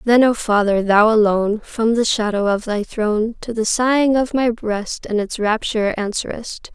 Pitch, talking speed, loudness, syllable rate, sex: 220 Hz, 185 wpm, -18 LUFS, 4.7 syllables/s, female